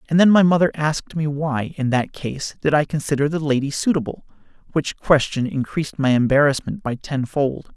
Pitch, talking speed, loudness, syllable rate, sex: 145 Hz, 170 wpm, -20 LUFS, 5.4 syllables/s, male